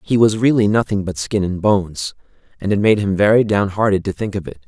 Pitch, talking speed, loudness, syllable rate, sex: 100 Hz, 230 wpm, -17 LUFS, 5.8 syllables/s, male